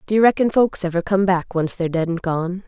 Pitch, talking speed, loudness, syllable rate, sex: 185 Hz, 270 wpm, -19 LUFS, 5.9 syllables/s, female